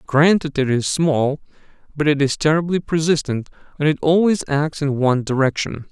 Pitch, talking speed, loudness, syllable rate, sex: 150 Hz, 160 wpm, -19 LUFS, 5.2 syllables/s, male